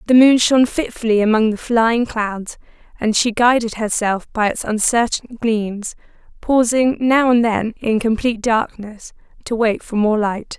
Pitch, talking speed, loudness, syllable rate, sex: 225 Hz, 160 wpm, -17 LUFS, 4.4 syllables/s, female